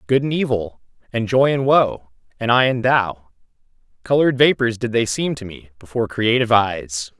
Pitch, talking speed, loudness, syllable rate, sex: 115 Hz, 165 wpm, -18 LUFS, 5.1 syllables/s, male